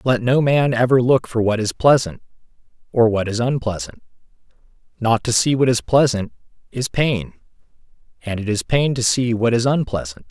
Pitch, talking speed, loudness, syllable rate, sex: 120 Hz, 175 wpm, -18 LUFS, 5.1 syllables/s, male